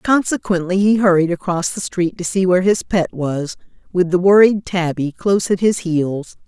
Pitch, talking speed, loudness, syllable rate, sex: 185 Hz, 185 wpm, -17 LUFS, 4.9 syllables/s, female